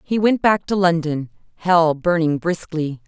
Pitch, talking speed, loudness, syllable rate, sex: 170 Hz, 155 wpm, -19 LUFS, 4.2 syllables/s, female